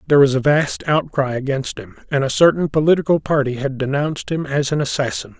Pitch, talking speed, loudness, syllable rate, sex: 140 Hz, 200 wpm, -18 LUFS, 6.0 syllables/s, male